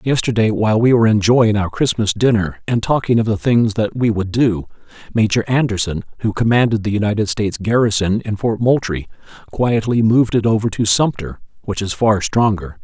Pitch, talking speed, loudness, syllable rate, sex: 110 Hz, 180 wpm, -16 LUFS, 5.5 syllables/s, male